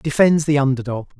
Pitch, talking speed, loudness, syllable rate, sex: 140 Hz, 200 wpm, -18 LUFS, 5.5 syllables/s, male